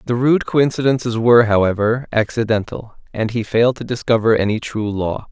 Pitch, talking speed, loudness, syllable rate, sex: 115 Hz, 160 wpm, -17 LUFS, 5.5 syllables/s, male